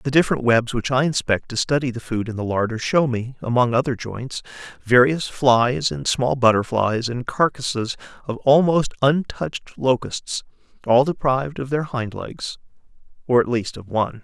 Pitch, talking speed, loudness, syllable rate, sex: 125 Hz, 170 wpm, -21 LUFS, 4.9 syllables/s, male